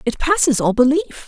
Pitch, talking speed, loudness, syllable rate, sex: 270 Hz, 190 wpm, -16 LUFS, 5.2 syllables/s, female